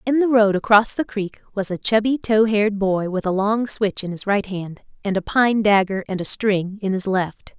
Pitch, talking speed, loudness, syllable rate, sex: 205 Hz, 235 wpm, -20 LUFS, 4.8 syllables/s, female